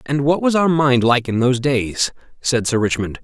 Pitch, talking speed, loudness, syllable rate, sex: 130 Hz, 220 wpm, -17 LUFS, 5.0 syllables/s, male